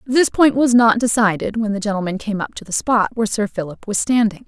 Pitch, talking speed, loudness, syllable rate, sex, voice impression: 215 Hz, 240 wpm, -18 LUFS, 5.8 syllables/s, female, feminine, adult-like, tensed, powerful, bright, slightly raspy, friendly, unique, intense